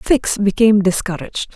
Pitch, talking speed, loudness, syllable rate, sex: 205 Hz, 115 wpm, -16 LUFS, 5.4 syllables/s, female